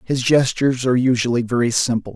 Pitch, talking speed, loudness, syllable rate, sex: 125 Hz, 165 wpm, -18 LUFS, 6.3 syllables/s, male